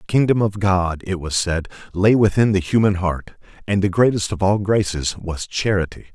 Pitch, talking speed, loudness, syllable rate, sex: 95 Hz, 195 wpm, -19 LUFS, 4.9 syllables/s, male